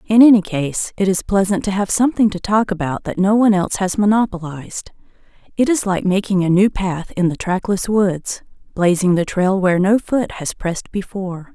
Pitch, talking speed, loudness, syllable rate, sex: 195 Hz, 195 wpm, -17 LUFS, 5.4 syllables/s, female